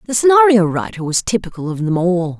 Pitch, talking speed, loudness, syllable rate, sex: 200 Hz, 200 wpm, -15 LUFS, 5.8 syllables/s, female